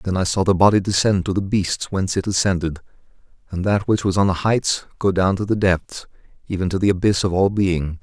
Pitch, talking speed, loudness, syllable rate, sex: 95 Hz, 230 wpm, -19 LUFS, 5.7 syllables/s, male